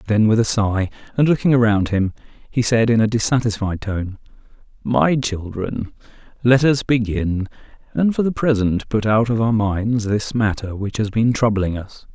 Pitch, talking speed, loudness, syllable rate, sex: 110 Hz, 175 wpm, -19 LUFS, 4.5 syllables/s, male